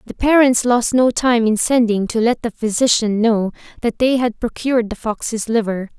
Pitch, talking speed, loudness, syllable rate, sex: 230 Hz, 190 wpm, -17 LUFS, 4.8 syllables/s, female